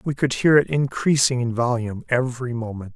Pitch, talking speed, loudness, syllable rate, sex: 125 Hz, 185 wpm, -21 LUFS, 5.7 syllables/s, male